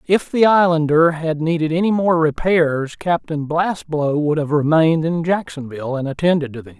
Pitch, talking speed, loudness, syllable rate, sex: 155 Hz, 170 wpm, -17 LUFS, 5.0 syllables/s, male